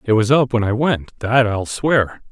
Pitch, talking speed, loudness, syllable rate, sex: 115 Hz, 235 wpm, -17 LUFS, 4.4 syllables/s, male